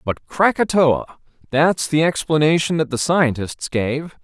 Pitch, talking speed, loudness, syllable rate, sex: 150 Hz, 125 wpm, -18 LUFS, 4.0 syllables/s, male